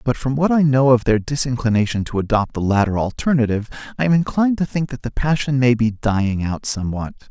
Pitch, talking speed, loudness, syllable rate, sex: 125 Hz, 215 wpm, -19 LUFS, 6.2 syllables/s, male